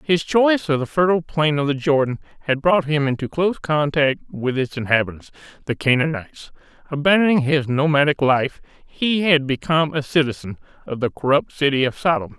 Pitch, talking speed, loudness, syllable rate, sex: 145 Hz, 170 wpm, -19 LUFS, 5.6 syllables/s, male